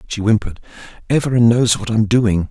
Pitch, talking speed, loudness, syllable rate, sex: 110 Hz, 170 wpm, -16 LUFS, 5.8 syllables/s, male